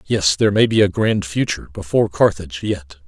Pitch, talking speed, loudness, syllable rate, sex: 95 Hz, 195 wpm, -18 LUFS, 6.0 syllables/s, male